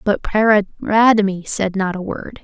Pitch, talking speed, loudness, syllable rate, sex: 200 Hz, 150 wpm, -17 LUFS, 4.2 syllables/s, female